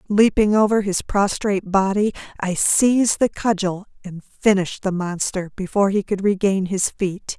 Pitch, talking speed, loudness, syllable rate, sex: 195 Hz, 155 wpm, -20 LUFS, 4.9 syllables/s, female